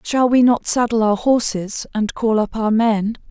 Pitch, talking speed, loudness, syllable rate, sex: 225 Hz, 200 wpm, -17 LUFS, 4.3 syllables/s, female